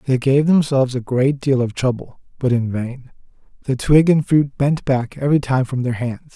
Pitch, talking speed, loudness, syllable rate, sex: 130 Hz, 210 wpm, -18 LUFS, 4.9 syllables/s, male